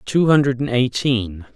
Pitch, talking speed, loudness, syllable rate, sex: 125 Hz, 115 wpm, -18 LUFS, 3.6 syllables/s, male